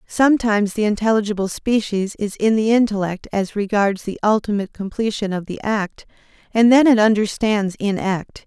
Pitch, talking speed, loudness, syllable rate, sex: 210 Hz, 155 wpm, -19 LUFS, 5.2 syllables/s, female